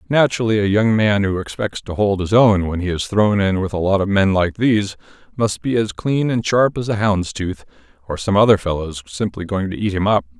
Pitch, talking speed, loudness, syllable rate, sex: 100 Hz, 240 wpm, -18 LUFS, 5.4 syllables/s, male